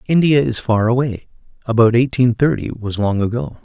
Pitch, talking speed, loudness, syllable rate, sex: 120 Hz, 165 wpm, -16 LUFS, 5.1 syllables/s, male